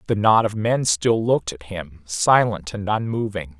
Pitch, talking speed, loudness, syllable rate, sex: 105 Hz, 185 wpm, -20 LUFS, 4.4 syllables/s, male